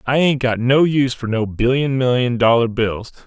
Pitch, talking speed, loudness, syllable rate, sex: 125 Hz, 200 wpm, -17 LUFS, 4.8 syllables/s, male